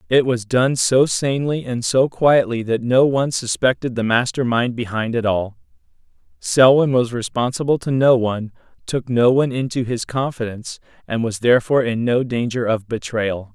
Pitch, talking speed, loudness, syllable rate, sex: 120 Hz, 170 wpm, -18 LUFS, 5.1 syllables/s, male